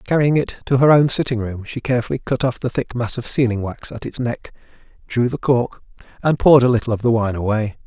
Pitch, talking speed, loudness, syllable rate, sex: 120 Hz, 235 wpm, -19 LUFS, 5.9 syllables/s, male